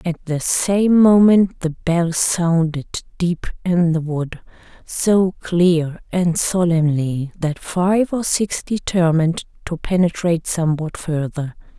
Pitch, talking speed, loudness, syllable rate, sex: 170 Hz, 120 wpm, -18 LUFS, 3.6 syllables/s, female